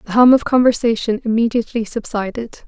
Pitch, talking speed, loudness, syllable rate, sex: 230 Hz, 135 wpm, -16 LUFS, 5.8 syllables/s, female